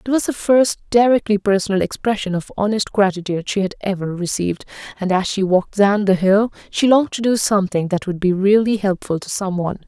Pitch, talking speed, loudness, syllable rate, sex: 200 Hz, 205 wpm, -18 LUFS, 6.0 syllables/s, female